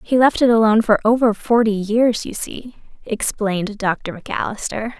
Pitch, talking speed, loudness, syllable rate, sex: 220 Hz, 155 wpm, -18 LUFS, 5.0 syllables/s, female